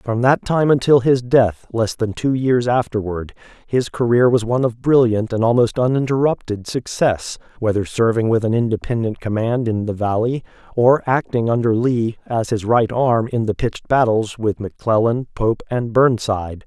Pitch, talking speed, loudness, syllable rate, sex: 115 Hz, 170 wpm, -18 LUFS, 4.8 syllables/s, male